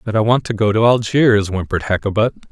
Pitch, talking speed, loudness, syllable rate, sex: 110 Hz, 215 wpm, -16 LUFS, 6.4 syllables/s, male